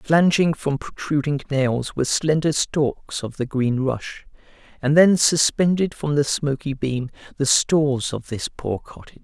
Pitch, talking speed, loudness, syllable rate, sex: 145 Hz, 155 wpm, -21 LUFS, 4.3 syllables/s, male